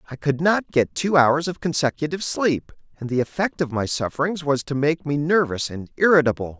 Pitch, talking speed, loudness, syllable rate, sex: 150 Hz, 200 wpm, -21 LUFS, 5.5 syllables/s, male